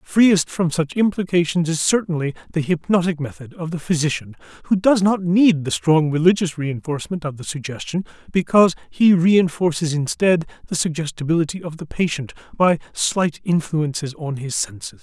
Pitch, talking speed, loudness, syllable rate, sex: 165 Hz, 150 wpm, -20 LUFS, 5.2 syllables/s, male